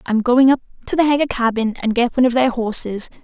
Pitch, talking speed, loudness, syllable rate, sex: 245 Hz, 240 wpm, -17 LUFS, 6.3 syllables/s, female